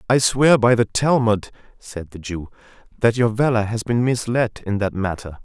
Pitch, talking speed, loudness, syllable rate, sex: 110 Hz, 190 wpm, -19 LUFS, 4.7 syllables/s, male